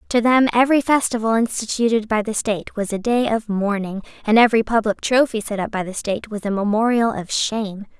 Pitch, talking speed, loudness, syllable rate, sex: 220 Hz, 205 wpm, -19 LUFS, 5.9 syllables/s, female